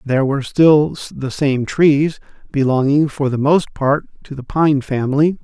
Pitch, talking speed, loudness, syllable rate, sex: 145 Hz, 165 wpm, -16 LUFS, 4.5 syllables/s, male